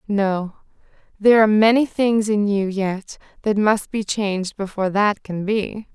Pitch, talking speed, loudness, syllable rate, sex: 205 Hz, 160 wpm, -19 LUFS, 4.5 syllables/s, female